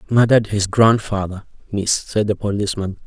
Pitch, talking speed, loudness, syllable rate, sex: 105 Hz, 135 wpm, -18 LUFS, 5.4 syllables/s, male